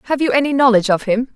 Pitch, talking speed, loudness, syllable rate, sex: 245 Hz, 265 wpm, -15 LUFS, 7.7 syllables/s, female